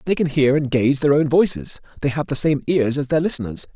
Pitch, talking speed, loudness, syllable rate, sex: 145 Hz, 255 wpm, -19 LUFS, 6.0 syllables/s, male